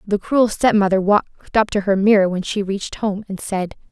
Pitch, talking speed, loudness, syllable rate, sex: 200 Hz, 215 wpm, -18 LUFS, 5.2 syllables/s, female